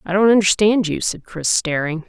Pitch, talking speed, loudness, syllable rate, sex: 185 Hz, 200 wpm, -17 LUFS, 5.1 syllables/s, female